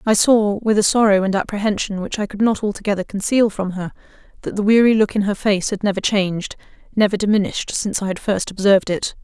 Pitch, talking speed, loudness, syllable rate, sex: 205 Hz, 215 wpm, -18 LUFS, 6.3 syllables/s, female